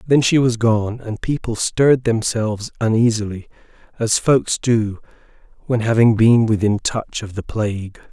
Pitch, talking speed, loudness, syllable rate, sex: 115 Hz, 150 wpm, -18 LUFS, 4.5 syllables/s, male